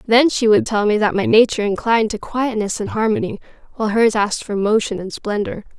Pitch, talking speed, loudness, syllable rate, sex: 215 Hz, 205 wpm, -18 LUFS, 6.0 syllables/s, female